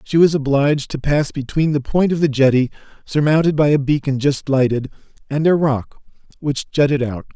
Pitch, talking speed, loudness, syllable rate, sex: 140 Hz, 190 wpm, -17 LUFS, 5.3 syllables/s, male